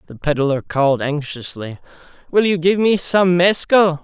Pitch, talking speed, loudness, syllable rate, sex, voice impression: 165 Hz, 150 wpm, -17 LUFS, 4.5 syllables/s, male, masculine, adult-like, tensed, powerful, bright, clear, friendly, unique, wild, lively, intense, light